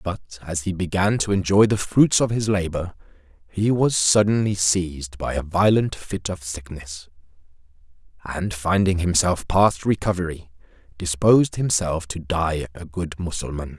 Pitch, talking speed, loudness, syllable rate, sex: 90 Hz, 145 wpm, -21 LUFS, 4.6 syllables/s, male